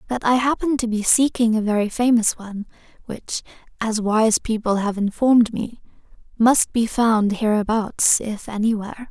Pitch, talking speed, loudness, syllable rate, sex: 225 Hz, 150 wpm, -20 LUFS, 4.7 syllables/s, female